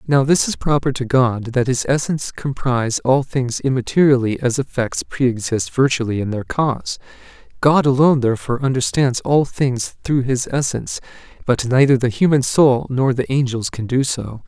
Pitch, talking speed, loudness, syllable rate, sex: 130 Hz, 170 wpm, -18 LUFS, 5.1 syllables/s, male